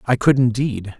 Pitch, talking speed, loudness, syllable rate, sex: 120 Hz, 180 wpm, -18 LUFS, 4.7 syllables/s, male